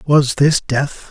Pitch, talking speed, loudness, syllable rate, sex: 140 Hz, 165 wpm, -15 LUFS, 3.0 syllables/s, male